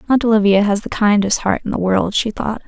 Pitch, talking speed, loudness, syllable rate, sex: 210 Hz, 245 wpm, -16 LUFS, 5.8 syllables/s, female